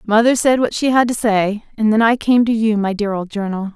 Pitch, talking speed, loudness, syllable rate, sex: 220 Hz, 270 wpm, -16 LUFS, 5.5 syllables/s, female